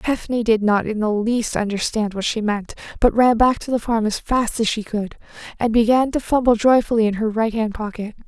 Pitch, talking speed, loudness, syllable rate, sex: 225 Hz, 215 wpm, -19 LUFS, 5.3 syllables/s, female